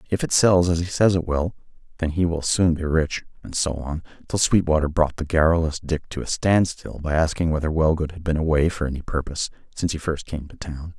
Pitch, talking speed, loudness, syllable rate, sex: 80 Hz, 225 wpm, -22 LUFS, 5.7 syllables/s, male